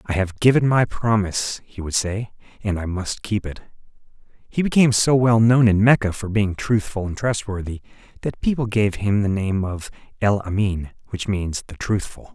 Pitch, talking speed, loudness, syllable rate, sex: 105 Hz, 185 wpm, -21 LUFS, 4.9 syllables/s, male